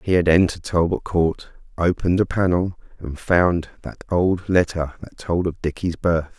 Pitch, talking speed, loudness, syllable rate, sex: 85 Hz, 170 wpm, -21 LUFS, 4.8 syllables/s, male